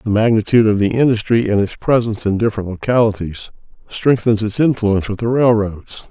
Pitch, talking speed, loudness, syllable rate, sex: 110 Hz, 165 wpm, -16 LUFS, 6.0 syllables/s, male